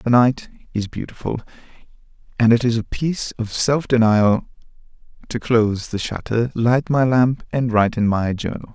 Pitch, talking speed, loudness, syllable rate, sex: 115 Hz, 165 wpm, -19 LUFS, 4.9 syllables/s, male